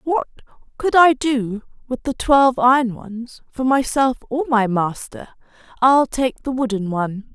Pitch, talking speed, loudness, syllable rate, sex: 250 Hz, 155 wpm, -18 LUFS, 4.3 syllables/s, female